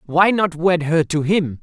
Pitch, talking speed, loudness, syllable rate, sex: 165 Hz, 220 wpm, -17 LUFS, 4.0 syllables/s, male